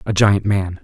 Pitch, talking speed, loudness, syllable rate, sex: 100 Hz, 215 wpm, -17 LUFS, 4.2 syllables/s, male